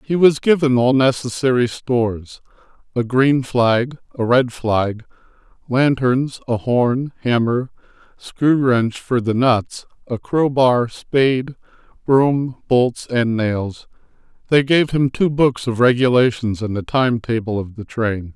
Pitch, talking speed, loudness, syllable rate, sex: 125 Hz, 135 wpm, -18 LUFS, 3.7 syllables/s, male